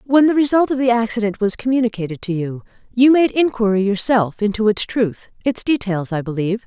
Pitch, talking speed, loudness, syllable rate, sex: 220 Hz, 190 wpm, -18 LUFS, 5.7 syllables/s, female